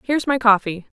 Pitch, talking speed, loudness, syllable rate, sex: 230 Hz, 180 wpm, -17 LUFS, 6.2 syllables/s, female